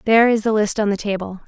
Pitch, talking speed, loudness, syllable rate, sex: 210 Hz, 285 wpm, -18 LUFS, 7.0 syllables/s, female